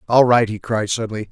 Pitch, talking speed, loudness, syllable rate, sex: 110 Hz, 230 wpm, -18 LUFS, 6.1 syllables/s, male